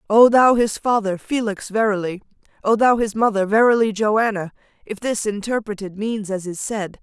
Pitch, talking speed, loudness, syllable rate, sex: 215 Hz, 160 wpm, -19 LUFS, 4.9 syllables/s, female